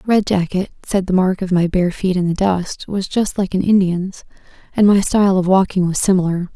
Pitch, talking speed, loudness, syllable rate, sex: 185 Hz, 220 wpm, -17 LUFS, 5.2 syllables/s, female